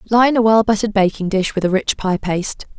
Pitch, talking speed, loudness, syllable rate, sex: 205 Hz, 235 wpm, -17 LUFS, 5.8 syllables/s, female